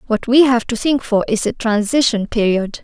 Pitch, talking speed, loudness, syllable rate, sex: 235 Hz, 210 wpm, -16 LUFS, 5.0 syllables/s, female